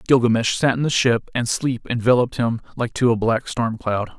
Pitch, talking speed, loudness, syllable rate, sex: 120 Hz, 215 wpm, -20 LUFS, 5.3 syllables/s, male